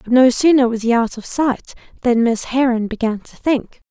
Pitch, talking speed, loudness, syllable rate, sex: 245 Hz, 215 wpm, -17 LUFS, 5.1 syllables/s, female